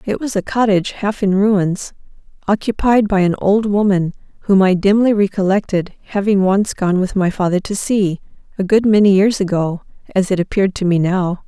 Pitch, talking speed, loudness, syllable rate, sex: 195 Hz, 180 wpm, -16 LUFS, 5.2 syllables/s, female